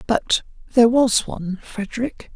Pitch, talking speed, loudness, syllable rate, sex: 230 Hz, 130 wpm, -20 LUFS, 5.1 syllables/s, female